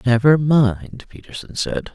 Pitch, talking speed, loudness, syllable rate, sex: 130 Hz, 125 wpm, -17 LUFS, 3.9 syllables/s, female